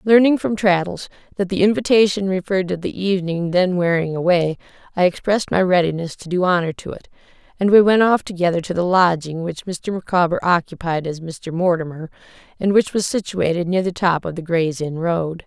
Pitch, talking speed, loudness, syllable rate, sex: 180 Hz, 190 wpm, -19 LUFS, 5.5 syllables/s, female